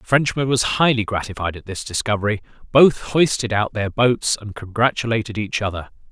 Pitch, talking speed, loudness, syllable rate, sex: 110 Hz, 165 wpm, -20 LUFS, 5.4 syllables/s, male